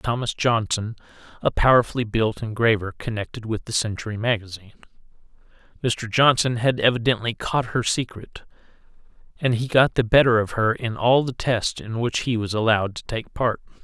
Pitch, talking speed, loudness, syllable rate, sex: 115 Hz, 160 wpm, -22 LUFS, 5.3 syllables/s, male